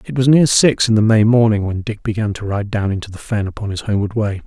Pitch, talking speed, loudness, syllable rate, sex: 110 Hz, 280 wpm, -16 LUFS, 6.2 syllables/s, male